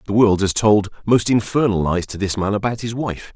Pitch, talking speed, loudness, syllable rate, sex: 105 Hz, 230 wpm, -18 LUFS, 5.3 syllables/s, male